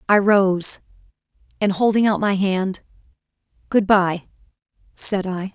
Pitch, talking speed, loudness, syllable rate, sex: 195 Hz, 110 wpm, -19 LUFS, 3.9 syllables/s, female